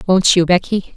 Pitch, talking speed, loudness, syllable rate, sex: 185 Hz, 190 wpm, -14 LUFS, 4.9 syllables/s, female